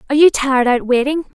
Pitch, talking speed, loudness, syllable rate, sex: 270 Hz, 215 wpm, -14 LUFS, 7.3 syllables/s, female